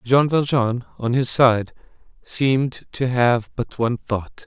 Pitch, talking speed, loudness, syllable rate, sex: 125 Hz, 150 wpm, -20 LUFS, 3.9 syllables/s, male